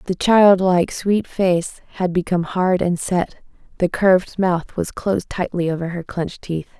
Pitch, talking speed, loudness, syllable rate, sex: 180 Hz, 170 wpm, -19 LUFS, 4.7 syllables/s, female